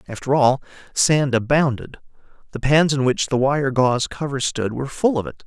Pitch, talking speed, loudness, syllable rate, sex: 135 Hz, 185 wpm, -20 LUFS, 5.2 syllables/s, male